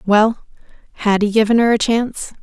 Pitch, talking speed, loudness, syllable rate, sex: 220 Hz, 175 wpm, -16 LUFS, 5.6 syllables/s, female